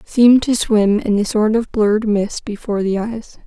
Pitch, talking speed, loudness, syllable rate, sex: 215 Hz, 210 wpm, -16 LUFS, 4.6 syllables/s, female